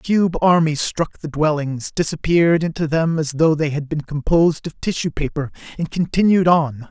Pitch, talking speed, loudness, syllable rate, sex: 160 Hz, 185 wpm, -19 LUFS, 5.0 syllables/s, male